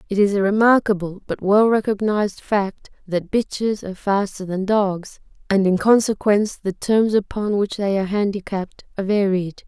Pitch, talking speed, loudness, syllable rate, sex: 200 Hz, 160 wpm, -20 LUFS, 5.1 syllables/s, female